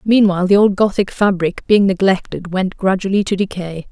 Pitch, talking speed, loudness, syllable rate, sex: 190 Hz, 170 wpm, -16 LUFS, 5.3 syllables/s, female